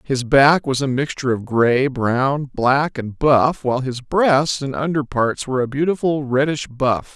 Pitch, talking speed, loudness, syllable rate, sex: 135 Hz, 185 wpm, -18 LUFS, 4.3 syllables/s, male